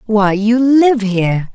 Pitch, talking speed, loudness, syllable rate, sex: 220 Hz, 155 wpm, -13 LUFS, 3.6 syllables/s, female